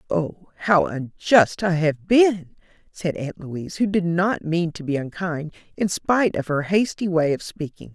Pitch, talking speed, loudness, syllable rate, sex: 170 Hz, 180 wpm, -22 LUFS, 4.3 syllables/s, female